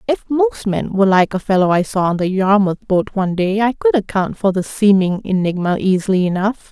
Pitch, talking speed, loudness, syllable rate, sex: 200 Hz, 215 wpm, -16 LUFS, 5.3 syllables/s, female